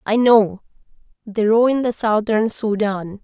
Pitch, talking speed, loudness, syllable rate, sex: 215 Hz, 130 wpm, -18 LUFS, 4.0 syllables/s, female